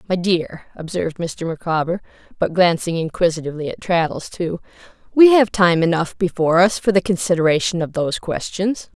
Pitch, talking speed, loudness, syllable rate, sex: 175 Hz, 145 wpm, -18 LUFS, 5.5 syllables/s, female